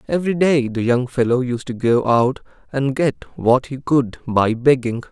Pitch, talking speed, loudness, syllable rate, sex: 130 Hz, 190 wpm, -18 LUFS, 4.6 syllables/s, male